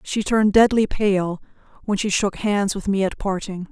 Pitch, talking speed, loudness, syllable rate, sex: 200 Hz, 195 wpm, -20 LUFS, 4.7 syllables/s, female